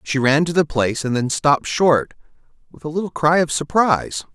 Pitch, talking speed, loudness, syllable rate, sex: 145 Hz, 205 wpm, -18 LUFS, 5.5 syllables/s, male